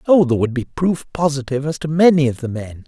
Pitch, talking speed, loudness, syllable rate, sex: 145 Hz, 250 wpm, -18 LUFS, 6.4 syllables/s, male